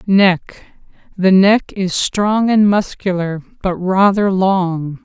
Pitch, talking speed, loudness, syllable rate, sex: 190 Hz, 105 wpm, -15 LUFS, 3.1 syllables/s, female